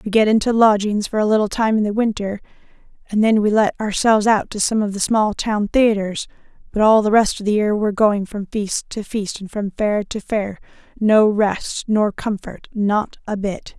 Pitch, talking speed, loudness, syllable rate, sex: 210 Hz, 210 wpm, -18 LUFS, 4.9 syllables/s, female